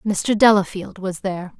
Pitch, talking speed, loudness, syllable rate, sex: 195 Hz, 150 wpm, -19 LUFS, 4.6 syllables/s, female